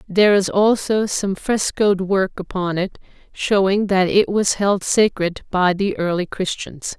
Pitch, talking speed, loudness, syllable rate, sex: 195 Hz, 155 wpm, -19 LUFS, 4.1 syllables/s, female